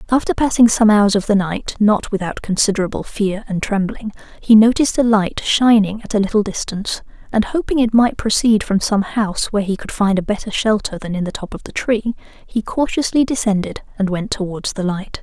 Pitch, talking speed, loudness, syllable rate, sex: 210 Hz, 205 wpm, -17 LUFS, 5.5 syllables/s, female